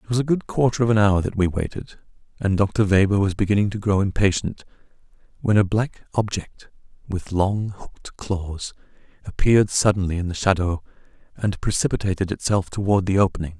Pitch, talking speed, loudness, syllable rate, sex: 100 Hz, 170 wpm, -22 LUFS, 5.5 syllables/s, male